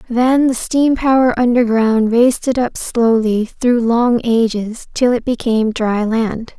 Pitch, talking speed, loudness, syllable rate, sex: 235 Hz, 155 wpm, -15 LUFS, 4.0 syllables/s, female